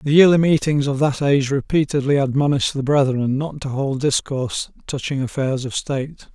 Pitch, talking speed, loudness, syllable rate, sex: 140 Hz, 170 wpm, -19 LUFS, 5.4 syllables/s, male